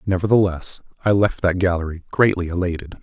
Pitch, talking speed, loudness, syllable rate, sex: 90 Hz, 140 wpm, -20 LUFS, 5.7 syllables/s, male